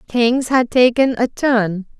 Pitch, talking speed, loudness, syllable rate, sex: 240 Hz, 150 wpm, -16 LUFS, 3.6 syllables/s, female